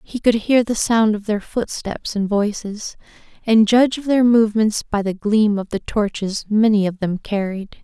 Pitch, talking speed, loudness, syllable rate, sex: 215 Hz, 190 wpm, -18 LUFS, 4.6 syllables/s, female